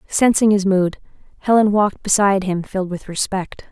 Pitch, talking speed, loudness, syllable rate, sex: 195 Hz, 160 wpm, -17 LUFS, 5.5 syllables/s, female